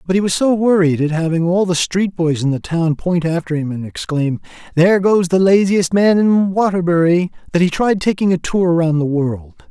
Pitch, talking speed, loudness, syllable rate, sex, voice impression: 175 Hz, 215 wpm, -16 LUFS, 5.0 syllables/s, male, masculine, adult-like, soft, slightly muffled, slightly sincere, friendly